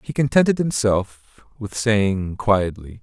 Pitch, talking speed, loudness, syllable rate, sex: 110 Hz, 120 wpm, -20 LUFS, 3.6 syllables/s, male